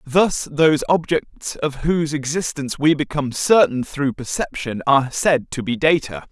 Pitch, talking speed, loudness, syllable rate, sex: 145 Hz, 150 wpm, -19 LUFS, 4.8 syllables/s, male